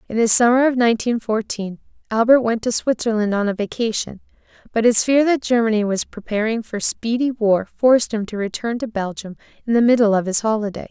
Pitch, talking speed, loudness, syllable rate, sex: 225 Hz, 195 wpm, -19 LUFS, 5.8 syllables/s, female